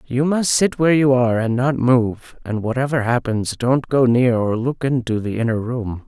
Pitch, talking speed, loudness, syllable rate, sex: 125 Hz, 205 wpm, -18 LUFS, 4.8 syllables/s, male